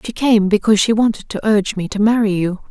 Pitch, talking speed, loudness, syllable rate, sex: 210 Hz, 245 wpm, -16 LUFS, 6.4 syllables/s, female